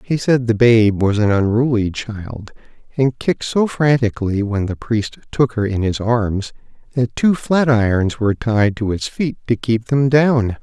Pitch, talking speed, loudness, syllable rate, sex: 115 Hz, 180 wpm, -17 LUFS, 4.4 syllables/s, male